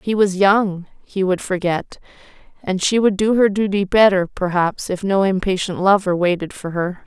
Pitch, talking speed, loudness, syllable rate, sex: 190 Hz, 180 wpm, -18 LUFS, 4.6 syllables/s, female